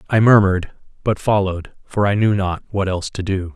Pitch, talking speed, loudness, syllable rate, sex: 95 Hz, 200 wpm, -18 LUFS, 6.0 syllables/s, male